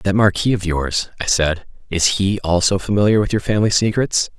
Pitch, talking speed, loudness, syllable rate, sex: 95 Hz, 190 wpm, -17 LUFS, 5.3 syllables/s, male